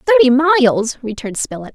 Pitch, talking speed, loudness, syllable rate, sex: 250 Hz, 140 wpm, -15 LUFS, 8.3 syllables/s, female